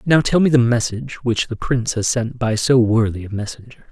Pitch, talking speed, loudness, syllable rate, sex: 120 Hz, 230 wpm, -18 LUFS, 5.6 syllables/s, male